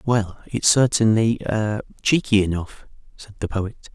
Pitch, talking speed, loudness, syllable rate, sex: 110 Hz, 105 wpm, -21 LUFS, 4.2 syllables/s, male